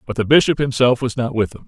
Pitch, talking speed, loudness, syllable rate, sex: 120 Hz, 285 wpm, -17 LUFS, 6.5 syllables/s, male